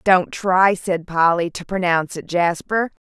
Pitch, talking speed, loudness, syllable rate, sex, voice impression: 180 Hz, 155 wpm, -19 LUFS, 4.2 syllables/s, female, very feminine, very adult-like, middle-aged, thin, very tensed, very powerful, bright, hard, very clear, very fluent, slightly raspy, cool, slightly intellectual, refreshing, sincere, slightly calm, slightly friendly, slightly reassuring, very unique, slightly elegant, wild, slightly sweet, very lively, very strict, very intense, sharp, light